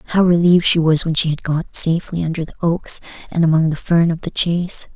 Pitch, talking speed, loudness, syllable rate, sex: 165 Hz, 230 wpm, -17 LUFS, 6.1 syllables/s, female